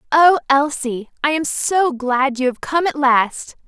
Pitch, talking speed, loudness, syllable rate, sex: 280 Hz, 180 wpm, -17 LUFS, 3.8 syllables/s, female